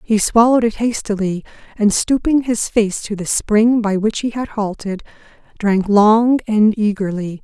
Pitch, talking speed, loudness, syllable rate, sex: 215 Hz, 160 wpm, -16 LUFS, 4.4 syllables/s, female